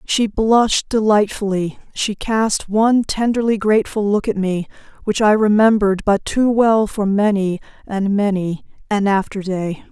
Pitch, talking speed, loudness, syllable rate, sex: 205 Hz, 145 wpm, -17 LUFS, 4.5 syllables/s, female